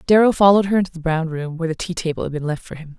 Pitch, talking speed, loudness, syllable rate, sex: 170 Hz, 320 wpm, -19 LUFS, 7.7 syllables/s, female